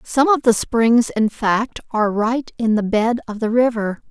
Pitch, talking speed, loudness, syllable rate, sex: 230 Hz, 205 wpm, -18 LUFS, 4.3 syllables/s, female